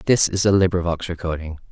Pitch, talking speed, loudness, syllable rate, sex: 90 Hz, 175 wpm, -20 LUFS, 6.3 syllables/s, male